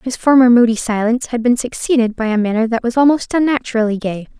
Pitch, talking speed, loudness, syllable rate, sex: 235 Hz, 205 wpm, -15 LUFS, 6.4 syllables/s, female